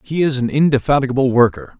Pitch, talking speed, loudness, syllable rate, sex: 130 Hz, 165 wpm, -16 LUFS, 6.5 syllables/s, male